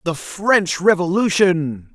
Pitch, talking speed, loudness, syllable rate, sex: 180 Hz, 95 wpm, -17 LUFS, 3.3 syllables/s, male